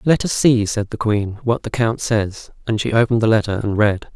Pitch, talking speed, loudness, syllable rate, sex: 110 Hz, 245 wpm, -18 LUFS, 5.3 syllables/s, male